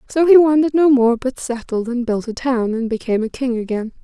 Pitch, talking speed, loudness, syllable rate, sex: 250 Hz, 240 wpm, -17 LUFS, 5.8 syllables/s, female